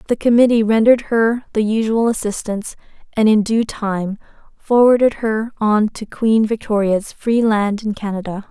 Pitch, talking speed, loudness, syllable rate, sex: 220 Hz, 150 wpm, -17 LUFS, 4.8 syllables/s, female